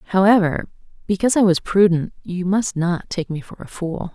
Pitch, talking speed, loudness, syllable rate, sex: 185 Hz, 190 wpm, -19 LUFS, 5.3 syllables/s, female